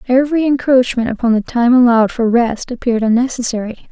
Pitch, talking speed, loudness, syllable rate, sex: 240 Hz, 155 wpm, -14 LUFS, 6.4 syllables/s, female